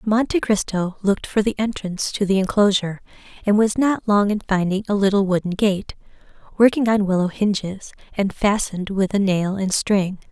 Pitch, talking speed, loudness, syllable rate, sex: 200 Hz, 175 wpm, -20 LUFS, 5.3 syllables/s, female